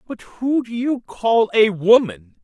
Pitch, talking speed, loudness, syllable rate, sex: 215 Hz, 175 wpm, -18 LUFS, 3.5 syllables/s, male